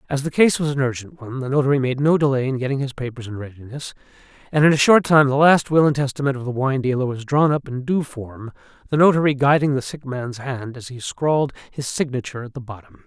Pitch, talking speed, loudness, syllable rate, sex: 135 Hz, 245 wpm, -19 LUFS, 6.2 syllables/s, male